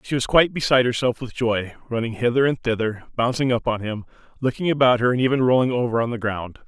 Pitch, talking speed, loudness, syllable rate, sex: 120 Hz, 225 wpm, -21 LUFS, 6.4 syllables/s, male